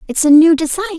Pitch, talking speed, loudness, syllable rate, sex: 325 Hz, 245 wpm, -11 LUFS, 8.7 syllables/s, female